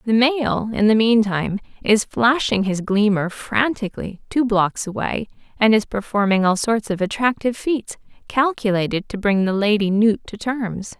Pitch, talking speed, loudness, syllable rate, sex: 215 Hz, 160 wpm, -19 LUFS, 4.7 syllables/s, female